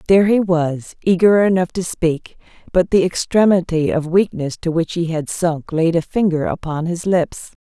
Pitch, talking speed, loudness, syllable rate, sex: 170 Hz, 180 wpm, -17 LUFS, 4.6 syllables/s, female